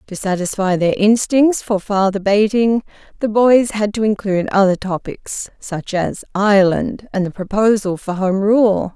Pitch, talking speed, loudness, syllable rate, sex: 205 Hz, 155 wpm, -16 LUFS, 4.4 syllables/s, female